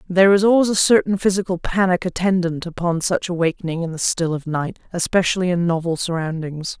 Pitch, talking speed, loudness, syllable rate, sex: 175 Hz, 175 wpm, -19 LUFS, 5.9 syllables/s, female